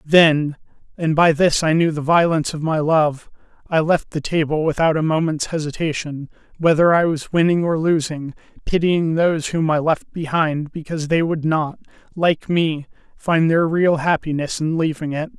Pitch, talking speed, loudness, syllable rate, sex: 160 Hz, 170 wpm, -19 LUFS, 4.8 syllables/s, male